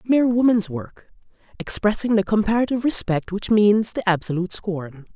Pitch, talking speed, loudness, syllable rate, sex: 205 Hz, 140 wpm, -20 LUFS, 5.4 syllables/s, female